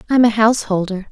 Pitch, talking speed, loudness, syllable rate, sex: 215 Hz, 160 wpm, -15 LUFS, 6.8 syllables/s, female